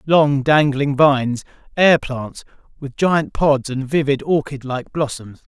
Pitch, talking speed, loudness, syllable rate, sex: 140 Hz, 130 wpm, -18 LUFS, 4.6 syllables/s, male